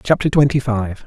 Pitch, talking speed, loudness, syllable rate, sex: 125 Hz, 170 wpm, -17 LUFS, 5.2 syllables/s, male